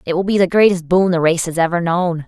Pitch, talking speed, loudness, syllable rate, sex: 175 Hz, 290 wpm, -15 LUFS, 6.0 syllables/s, female